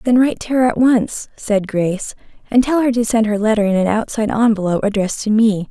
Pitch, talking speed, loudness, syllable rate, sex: 220 Hz, 230 wpm, -16 LUFS, 6.2 syllables/s, female